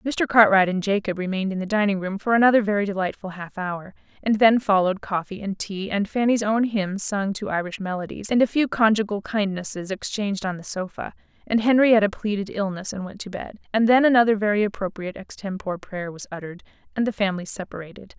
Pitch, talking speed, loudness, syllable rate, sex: 200 Hz, 195 wpm, -23 LUFS, 6.1 syllables/s, female